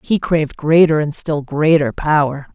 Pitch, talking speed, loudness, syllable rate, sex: 150 Hz, 165 wpm, -16 LUFS, 4.6 syllables/s, female